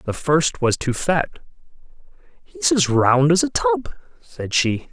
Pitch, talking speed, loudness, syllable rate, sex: 145 Hz, 160 wpm, -19 LUFS, 3.6 syllables/s, male